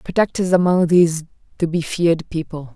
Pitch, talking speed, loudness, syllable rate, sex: 170 Hz, 175 wpm, -18 LUFS, 5.6 syllables/s, female